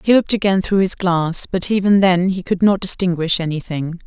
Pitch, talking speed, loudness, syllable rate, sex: 185 Hz, 205 wpm, -17 LUFS, 5.4 syllables/s, female